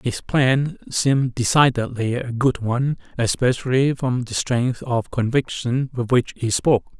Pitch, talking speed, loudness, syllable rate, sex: 125 Hz, 145 wpm, -21 LUFS, 4.3 syllables/s, male